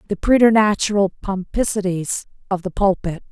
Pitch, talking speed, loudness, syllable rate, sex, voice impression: 195 Hz, 110 wpm, -19 LUFS, 5.1 syllables/s, female, feminine, adult-like, relaxed, slightly powerful, slightly hard, fluent, raspy, intellectual, calm, elegant, sharp